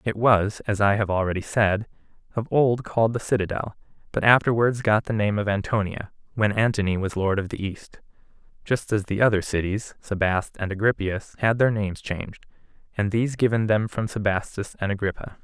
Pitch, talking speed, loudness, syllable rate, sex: 105 Hz, 180 wpm, -24 LUFS, 5.4 syllables/s, male